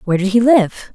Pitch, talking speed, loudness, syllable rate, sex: 215 Hz, 255 wpm, -14 LUFS, 6.0 syllables/s, female